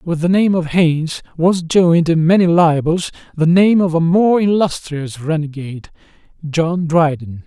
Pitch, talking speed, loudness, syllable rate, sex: 165 Hz, 155 wpm, -15 LUFS, 4.5 syllables/s, male